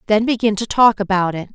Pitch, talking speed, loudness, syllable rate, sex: 210 Hz, 235 wpm, -16 LUFS, 6.0 syllables/s, female